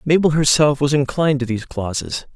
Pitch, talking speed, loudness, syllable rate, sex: 140 Hz, 180 wpm, -18 LUFS, 5.9 syllables/s, male